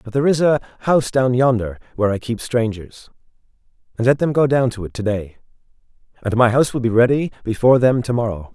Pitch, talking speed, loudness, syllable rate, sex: 120 Hz, 210 wpm, -18 LUFS, 6.5 syllables/s, male